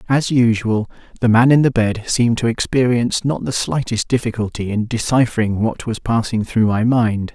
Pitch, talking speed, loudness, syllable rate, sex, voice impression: 115 Hz, 180 wpm, -17 LUFS, 5.1 syllables/s, male, masculine, adult-like, refreshing, slightly calm, friendly, slightly kind